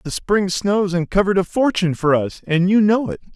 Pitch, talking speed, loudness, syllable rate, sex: 185 Hz, 215 wpm, -18 LUFS, 5.6 syllables/s, male